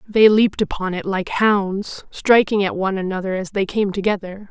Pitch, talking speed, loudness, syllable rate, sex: 195 Hz, 185 wpm, -19 LUFS, 5.1 syllables/s, female